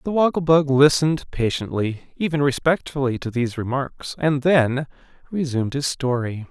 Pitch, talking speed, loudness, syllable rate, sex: 140 Hz, 120 wpm, -21 LUFS, 5.1 syllables/s, male